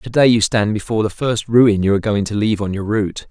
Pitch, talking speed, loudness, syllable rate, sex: 105 Hz, 290 wpm, -17 LUFS, 6.4 syllables/s, male